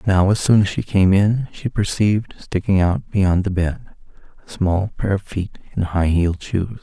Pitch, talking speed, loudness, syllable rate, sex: 95 Hz, 200 wpm, -19 LUFS, 4.6 syllables/s, male